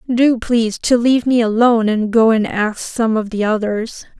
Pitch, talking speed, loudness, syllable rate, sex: 225 Hz, 200 wpm, -15 LUFS, 4.9 syllables/s, female